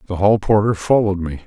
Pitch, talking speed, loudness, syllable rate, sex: 100 Hz, 205 wpm, -17 LUFS, 6.8 syllables/s, male